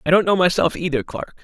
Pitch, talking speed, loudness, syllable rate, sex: 170 Hz, 250 wpm, -19 LUFS, 6.1 syllables/s, male